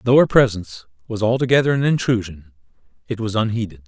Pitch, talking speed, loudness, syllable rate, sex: 110 Hz, 155 wpm, -18 LUFS, 6.3 syllables/s, male